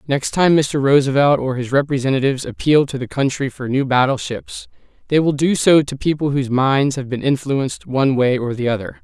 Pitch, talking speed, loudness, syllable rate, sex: 135 Hz, 200 wpm, -17 LUFS, 5.6 syllables/s, male